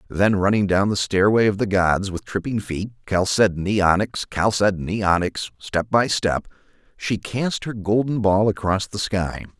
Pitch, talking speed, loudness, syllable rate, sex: 100 Hz, 165 wpm, -21 LUFS, 4.6 syllables/s, male